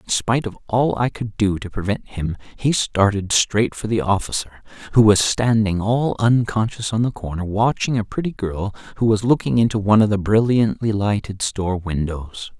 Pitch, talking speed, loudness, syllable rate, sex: 105 Hz, 185 wpm, -20 LUFS, 5.0 syllables/s, male